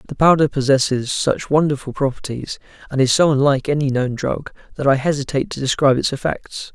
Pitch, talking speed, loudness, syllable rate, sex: 140 Hz, 180 wpm, -18 LUFS, 6.0 syllables/s, male